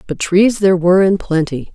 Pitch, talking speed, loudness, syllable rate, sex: 180 Hz, 205 wpm, -14 LUFS, 5.7 syllables/s, female